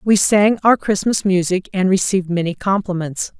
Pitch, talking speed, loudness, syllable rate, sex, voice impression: 190 Hz, 160 wpm, -17 LUFS, 4.9 syllables/s, female, feminine, middle-aged, tensed, powerful, clear, fluent, intellectual, lively, strict, slightly intense, sharp